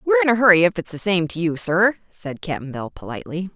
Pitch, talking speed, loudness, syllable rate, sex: 185 Hz, 255 wpm, -19 LUFS, 6.3 syllables/s, female